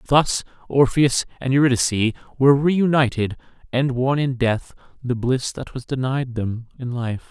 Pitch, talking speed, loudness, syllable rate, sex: 130 Hz, 155 wpm, -21 LUFS, 4.7 syllables/s, male